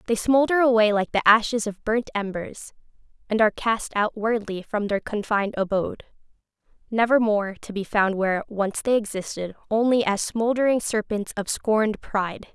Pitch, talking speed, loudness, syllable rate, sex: 215 Hz, 160 wpm, -23 LUFS, 5.1 syllables/s, female